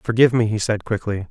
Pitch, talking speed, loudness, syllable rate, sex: 110 Hz, 230 wpm, -19 LUFS, 6.4 syllables/s, male